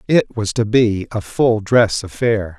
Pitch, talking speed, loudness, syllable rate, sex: 110 Hz, 185 wpm, -17 LUFS, 3.8 syllables/s, male